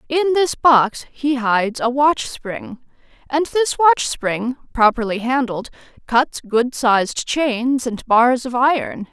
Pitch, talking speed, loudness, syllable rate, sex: 255 Hz, 145 wpm, -18 LUFS, 3.5 syllables/s, female